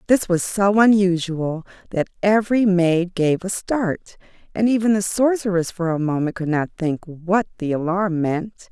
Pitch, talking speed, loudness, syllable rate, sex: 185 Hz, 165 wpm, -20 LUFS, 4.4 syllables/s, female